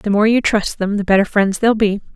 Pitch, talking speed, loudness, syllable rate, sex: 205 Hz, 280 wpm, -16 LUFS, 5.5 syllables/s, female